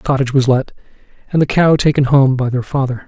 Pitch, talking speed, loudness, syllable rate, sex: 135 Hz, 235 wpm, -14 LUFS, 6.5 syllables/s, male